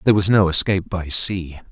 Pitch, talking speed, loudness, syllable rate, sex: 90 Hz, 210 wpm, -18 LUFS, 6.0 syllables/s, male